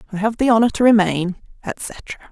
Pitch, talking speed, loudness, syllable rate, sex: 215 Hz, 180 wpm, -17 LUFS, 5.2 syllables/s, female